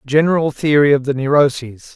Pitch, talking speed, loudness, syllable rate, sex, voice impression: 140 Hz, 155 wpm, -15 LUFS, 5.5 syllables/s, male, masculine, adult-like, tensed, powerful, soft, clear, cool, intellectual, calm, friendly, reassuring, wild, lively, slightly modest